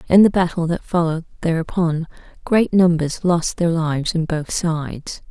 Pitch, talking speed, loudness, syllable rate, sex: 170 Hz, 160 wpm, -19 LUFS, 4.9 syllables/s, female